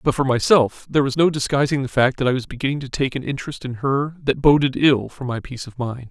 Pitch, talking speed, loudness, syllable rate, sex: 135 Hz, 265 wpm, -20 LUFS, 6.2 syllables/s, male